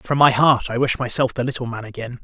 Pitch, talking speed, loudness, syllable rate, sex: 125 Hz, 270 wpm, -19 LUFS, 5.9 syllables/s, male